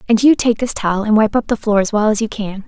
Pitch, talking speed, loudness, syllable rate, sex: 215 Hz, 335 wpm, -15 LUFS, 6.4 syllables/s, female